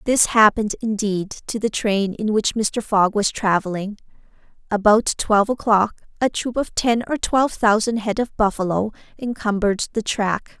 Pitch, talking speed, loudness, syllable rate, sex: 215 Hz, 160 wpm, -20 LUFS, 4.8 syllables/s, female